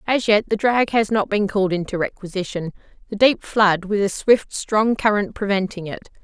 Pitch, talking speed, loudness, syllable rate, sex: 205 Hz, 190 wpm, -20 LUFS, 5.1 syllables/s, female